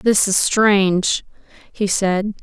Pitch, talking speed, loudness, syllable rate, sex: 200 Hz, 125 wpm, -17 LUFS, 3.2 syllables/s, female